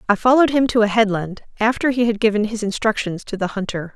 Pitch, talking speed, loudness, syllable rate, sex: 215 Hz, 230 wpm, -19 LUFS, 6.4 syllables/s, female